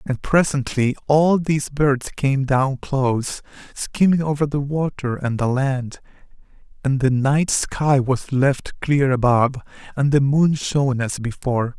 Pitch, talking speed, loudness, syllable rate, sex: 135 Hz, 150 wpm, -20 LUFS, 4.2 syllables/s, male